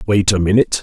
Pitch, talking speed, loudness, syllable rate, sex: 100 Hz, 220 wpm, -15 LUFS, 7.3 syllables/s, male